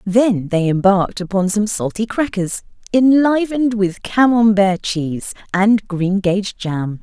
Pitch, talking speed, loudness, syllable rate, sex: 205 Hz, 130 wpm, -17 LUFS, 4.1 syllables/s, female